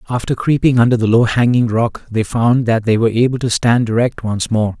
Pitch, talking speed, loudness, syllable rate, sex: 115 Hz, 225 wpm, -15 LUFS, 5.5 syllables/s, male